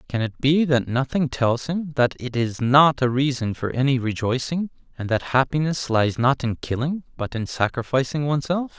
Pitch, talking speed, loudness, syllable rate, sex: 130 Hz, 185 wpm, -22 LUFS, 4.9 syllables/s, male